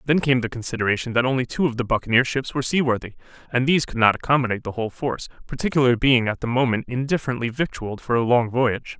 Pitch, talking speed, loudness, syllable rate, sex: 125 Hz, 205 wpm, -22 LUFS, 7.3 syllables/s, male